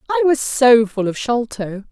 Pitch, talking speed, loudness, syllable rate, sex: 240 Hz, 190 wpm, -16 LUFS, 4.3 syllables/s, female